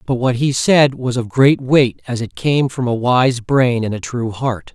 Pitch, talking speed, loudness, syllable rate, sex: 125 Hz, 240 wpm, -16 LUFS, 4.2 syllables/s, male